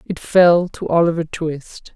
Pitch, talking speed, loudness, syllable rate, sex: 165 Hz, 155 wpm, -17 LUFS, 3.8 syllables/s, female